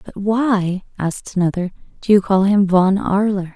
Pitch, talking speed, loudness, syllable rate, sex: 195 Hz, 170 wpm, -17 LUFS, 4.6 syllables/s, female